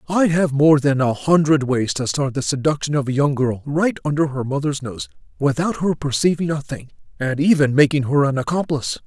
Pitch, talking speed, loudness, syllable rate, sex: 140 Hz, 205 wpm, -19 LUFS, 5.3 syllables/s, male